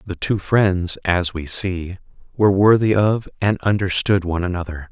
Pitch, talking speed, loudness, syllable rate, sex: 95 Hz, 160 wpm, -19 LUFS, 4.8 syllables/s, male